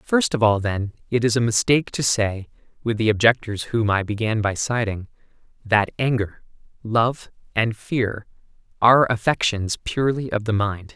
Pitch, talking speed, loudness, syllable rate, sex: 115 Hz, 160 wpm, -21 LUFS, 4.8 syllables/s, male